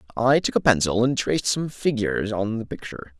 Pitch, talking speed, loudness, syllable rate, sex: 115 Hz, 205 wpm, -22 LUFS, 6.0 syllables/s, male